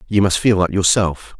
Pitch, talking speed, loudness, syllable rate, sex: 95 Hz, 215 wpm, -16 LUFS, 5.0 syllables/s, male